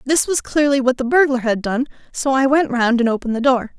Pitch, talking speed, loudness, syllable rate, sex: 260 Hz, 255 wpm, -17 LUFS, 5.9 syllables/s, female